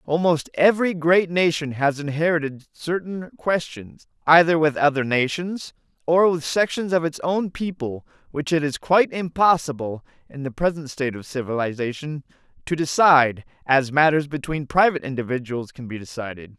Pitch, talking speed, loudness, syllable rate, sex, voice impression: 150 Hz, 145 wpm, -21 LUFS, 5.1 syllables/s, male, very masculine, slightly young, very adult-like, slightly thick, tensed, slightly powerful, very bright, slightly hard, clear, very fluent, slightly raspy, slightly cool, slightly intellectual, very refreshing, sincere, slightly calm, very friendly, reassuring, very unique, slightly elegant, wild, very lively, slightly kind, intense, light